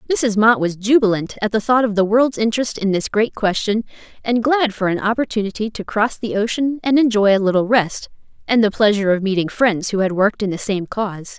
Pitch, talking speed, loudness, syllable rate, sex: 215 Hz, 220 wpm, -18 LUFS, 5.7 syllables/s, female